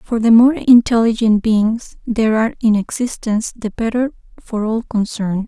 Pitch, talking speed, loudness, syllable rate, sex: 225 Hz, 155 wpm, -16 LUFS, 5.0 syllables/s, female